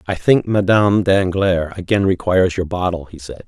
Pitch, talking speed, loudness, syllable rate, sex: 95 Hz, 175 wpm, -16 LUFS, 5.1 syllables/s, male